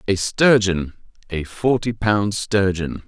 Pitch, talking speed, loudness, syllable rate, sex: 100 Hz, 115 wpm, -19 LUFS, 3.5 syllables/s, male